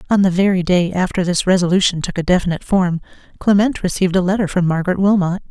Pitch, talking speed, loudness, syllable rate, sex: 185 Hz, 195 wpm, -16 LUFS, 6.8 syllables/s, female